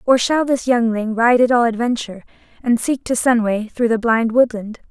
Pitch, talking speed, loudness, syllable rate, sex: 235 Hz, 195 wpm, -17 LUFS, 5.1 syllables/s, female